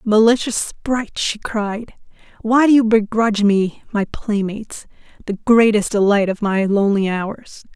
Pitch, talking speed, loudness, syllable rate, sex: 215 Hz, 140 wpm, -17 LUFS, 4.5 syllables/s, female